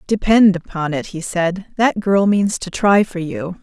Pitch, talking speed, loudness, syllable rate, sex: 190 Hz, 200 wpm, -17 LUFS, 4.1 syllables/s, female